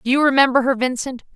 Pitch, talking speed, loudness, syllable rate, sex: 260 Hz, 220 wpm, -17 LUFS, 6.8 syllables/s, female